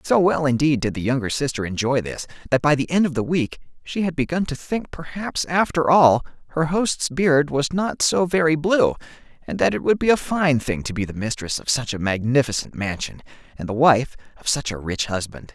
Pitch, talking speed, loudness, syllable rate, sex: 140 Hz, 220 wpm, -21 LUFS, 5.2 syllables/s, male